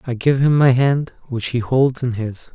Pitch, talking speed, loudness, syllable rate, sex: 125 Hz, 235 wpm, -18 LUFS, 4.4 syllables/s, male